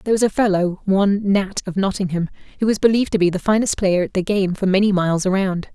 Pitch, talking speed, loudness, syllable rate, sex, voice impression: 195 Hz, 240 wpm, -19 LUFS, 6.6 syllables/s, female, very feminine, slightly young, slightly adult-like, very thin, tensed, slightly powerful, bright, hard, very clear, fluent, cute, intellectual, very refreshing, sincere, calm, friendly, reassuring, slightly unique, very elegant, sweet, lively, slightly strict, slightly intense, slightly sharp, light